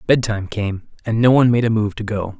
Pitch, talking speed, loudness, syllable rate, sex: 110 Hz, 250 wpm, -18 LUFS, 6.2 syllables/s, male